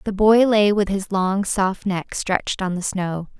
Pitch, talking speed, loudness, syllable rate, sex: 195 Hz, 210 wpm, -20 LUFS, 4.1 syllables/s, female